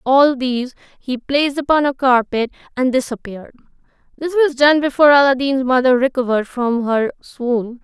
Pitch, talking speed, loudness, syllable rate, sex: 260 Hz, 145 wpm, -16 LUFS, 5.3 syllables/s, female